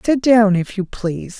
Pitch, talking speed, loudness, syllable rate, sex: 205 Hz, 215 wpm, -16 LUFS, 4.8 syllables/s, female